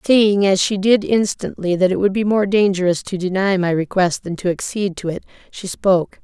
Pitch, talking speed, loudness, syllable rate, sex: 190 Hz, 210 wpm, -18 LUFS, 5.3 syllables/s, female